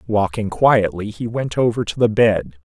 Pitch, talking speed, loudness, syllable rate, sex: 105 Hz, 180 wpm, -18 LUFS, 4.5 syllables/s, male